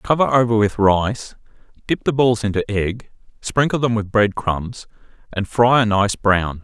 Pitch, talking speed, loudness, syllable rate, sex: 110 Hz, 170 wpm, -18 LUFS, 4.3 syllables/s, male